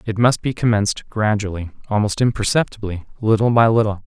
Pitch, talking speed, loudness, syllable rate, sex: 110 Hz, 150 wpm, -19 LUFS, 5.9 syllables/s, male